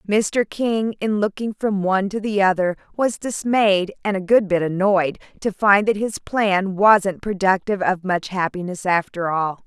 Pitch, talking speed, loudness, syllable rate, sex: 195 Hz, 175 wpm, -20 LUFS, 4.4 syllables/s, female